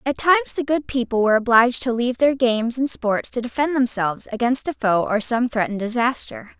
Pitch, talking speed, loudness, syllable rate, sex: 240 Hz, 210 wpm, -20 LUFS, 6.1 syllables/s, female